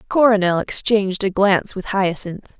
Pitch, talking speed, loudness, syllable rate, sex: 195 Hz, 140 wpm, -18 LUFS, 5.0 syllables/s, female